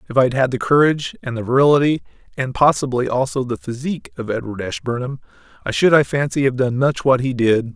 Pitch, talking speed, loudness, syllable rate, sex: 130 Hz, 200 wpm, -18 LUFS, 6.0 syllables/s, male